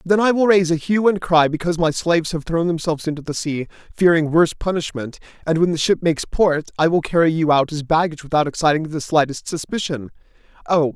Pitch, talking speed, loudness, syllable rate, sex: 165 Hz, 215 wpm, -19 LUFS, 6.2 syllables/s, male